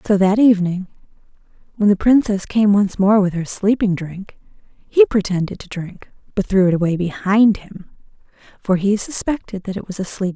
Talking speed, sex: 185 wpm, female